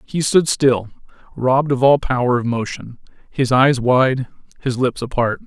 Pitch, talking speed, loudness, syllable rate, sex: 130 Hz, 165 wpm, -17 LUFS, 4.5 syllables/s, male